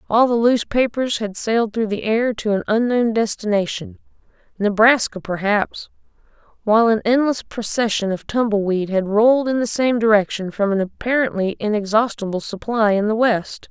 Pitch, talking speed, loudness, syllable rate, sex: 220 Hz, 150 wpm, -19 LUFS, 5.1 syllables/s, female